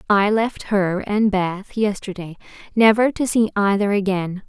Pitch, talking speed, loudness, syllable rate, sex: 205 Hz, 145 wpm, -19 LUFS, 4.2 syllables/s, female